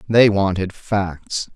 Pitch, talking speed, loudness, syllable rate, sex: 100 Hz, 115 wpm, -19 LUFS, 3.0 syllables/s, male